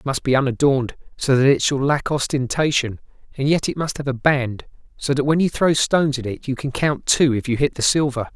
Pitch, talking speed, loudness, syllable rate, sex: 135 Hz, 245 wpm, -20 LUFS, 5.6 syllables/s, male